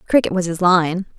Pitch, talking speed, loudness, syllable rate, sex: 180 Hz, 205 wpm, -17 LUFS, 5.5 syllables/s, female